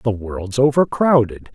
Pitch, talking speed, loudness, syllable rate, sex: 120 Hz, 115 wpm, -17 LUFS, 4.0 syllables/s, male